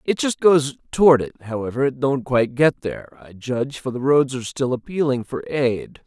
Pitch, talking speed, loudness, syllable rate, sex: 130 Hz, 210 wpm, -20 LUFS, 5.4 syllables/s, male